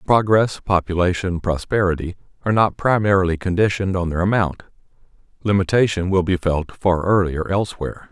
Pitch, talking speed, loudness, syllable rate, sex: 95 Hz, 125 wpm, -19 LUFS, 5.7 syllables/s, male